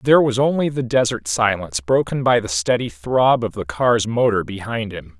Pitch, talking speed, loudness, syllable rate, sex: 115 Hz, 195 wpm, -19 LUFS, 5.1 syllables/s, male